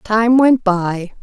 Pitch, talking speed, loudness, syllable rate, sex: 215 Hz, 145 wpm, -14 LUFS, 2.6 syllables/s, female